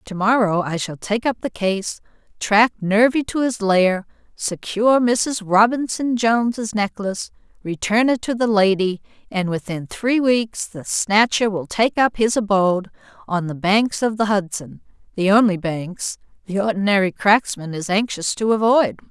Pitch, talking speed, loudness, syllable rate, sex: 210 Hz, 155 wpm, -19 LUFS, 4.4 syllables/s, female